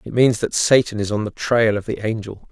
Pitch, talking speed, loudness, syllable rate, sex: 110 Hz, 260 wpm, -19 LUFS, 5.4 syllables/s, male